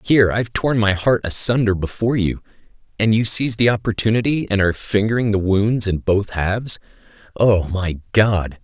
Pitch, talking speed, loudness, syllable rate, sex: 105 Hz, 165 wpm, -18 LUFS, 5.4 syllables/s, male